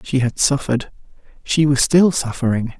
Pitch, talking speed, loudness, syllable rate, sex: 135 Hz, 150 wpm, -17 LUFS, 5.1 syllables/s, male